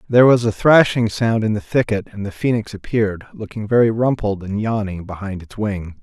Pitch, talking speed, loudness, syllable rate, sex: 105 Hz, 200 wpm, -18 LUFS, 5.5 syllables/s, male